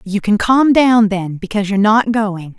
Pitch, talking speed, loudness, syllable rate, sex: 210 Hz, 210 wpm, -14 LUFS, 4.8 syllables/s, female